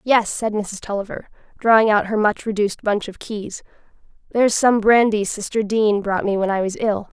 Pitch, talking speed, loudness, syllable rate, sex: 210 Hz, 190 wpm, -19 LUFS, 5.3 syllables/s, female